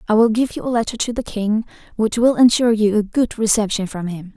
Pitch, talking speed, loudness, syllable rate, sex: 220 Hz, 250 wpm, -18 LUFS, 5.9 syllables/s, female